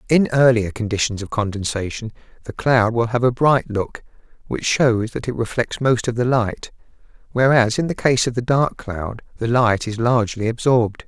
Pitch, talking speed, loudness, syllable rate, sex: 115 Hz, 185 wpm, -19 LUFS, 4.9 syllables/s, male